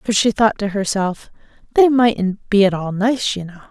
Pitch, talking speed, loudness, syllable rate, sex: 210 Hz, 210 wpm, -17 LUFS, 4.6 syllables/s, female